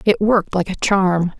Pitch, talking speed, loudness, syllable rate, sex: 190 Hz, 215 wpm, -17 LUFS, 4.8 syllables/s, female